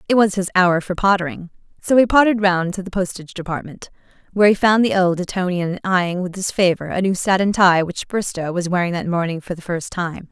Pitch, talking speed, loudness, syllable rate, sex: 185 Hz, 215 wpm, -18 LUFS, 5.8 syllables/s, female